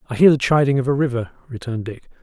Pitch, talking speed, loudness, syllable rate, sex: 130 Hz, 245 wpm, -18 LUFS, 7.1 syllables/s, male